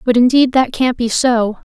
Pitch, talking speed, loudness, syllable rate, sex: 245 Hz, 210 wpm, -14 LUFS, 4.6 syllables/s, female